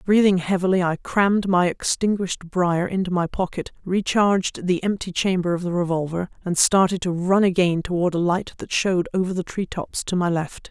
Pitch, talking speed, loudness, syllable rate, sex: 180 Hz, 180 wpm, -22 LUFS, 5.3 syllables/s, female